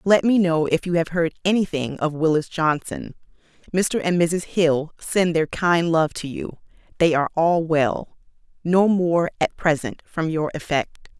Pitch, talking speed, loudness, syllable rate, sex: 165 Hz, 170 wpm, -21 LUFS, 4.3 syllables/s, female